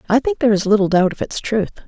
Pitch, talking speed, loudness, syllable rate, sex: 215 Hz, 290 wpm, -17 LUFS, 7.2 syllables/s, female